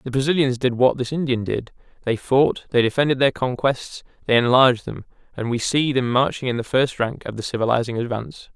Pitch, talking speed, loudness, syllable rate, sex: 125 Hz, 205 wpm, -20 LUFS, 5.7 syllables/s, male